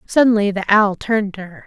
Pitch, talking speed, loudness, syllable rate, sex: 205 Hz, 215 wpm, -16 LUFS, 5.9 syllables/s, female